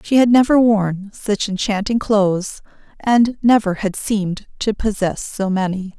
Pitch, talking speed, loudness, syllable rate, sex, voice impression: 205 Hz, 150 wpm, -18 LUFS, 4.3 syllables/s, female, feminine, middle-aged, tensed, powerful, bright, raspy, intellectual, calm, slightly friendly, slightly reassuring, lively, slightly sharp